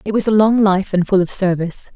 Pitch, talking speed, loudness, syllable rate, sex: 195 Hz, 275 wpm, -16 LUFS, 6.2 syllables/s, female